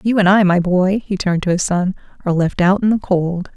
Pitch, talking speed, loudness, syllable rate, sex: 185 Hz, 270 wpm, -16 LUFS, 5.8 syllables/s, female